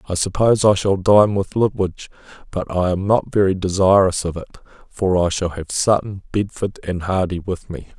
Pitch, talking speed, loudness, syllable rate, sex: 95 Hz, 190 wpm, -19 LUFS, 5.2 syllables/s, male